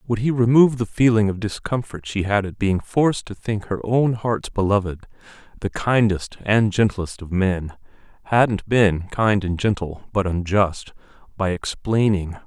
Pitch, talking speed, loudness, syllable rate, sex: 105 Hz, 160 wpm, -21 LUFS, 4.4 syllables/s, male